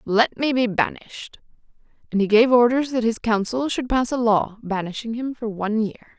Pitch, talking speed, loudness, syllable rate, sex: 230 Hz, 195 wpm, -21 LUFS, 5.3 syllables/s, female